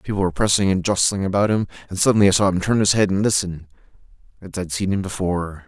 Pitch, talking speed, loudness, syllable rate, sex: 95 Hz, 235 wpm, -19 LUFS, 7.0 syllables/s, male